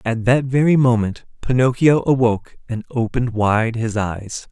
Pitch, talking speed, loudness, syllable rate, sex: 120 Hz, 145 wpm, -18 LUFS, 4.7 syllables/s, male